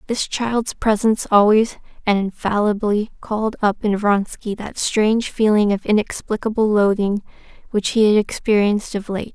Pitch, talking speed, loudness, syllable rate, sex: 210 Hz, 140 wpm, -19 LUFS, 4.9 syllables/s, female